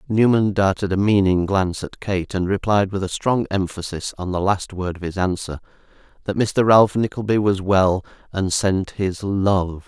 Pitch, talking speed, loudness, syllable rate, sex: 95 Hz, 180 wpm, -20 LUFS, 4.6 syllables/s, male